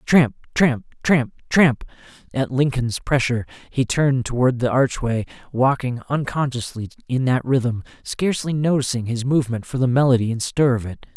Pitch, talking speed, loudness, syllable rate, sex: 130 Hz, 150 wpm, -21 LUFS, 5.1 syllables/s, male